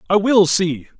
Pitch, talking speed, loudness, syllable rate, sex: 185 Hz, 180 wpm, -16 LUFS, 4.3 syllables/s, male